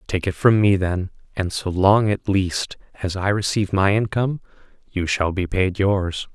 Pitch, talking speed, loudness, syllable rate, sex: 95 Hz, 190 wpm, -21 LUFS, 4.5 syllables/s, male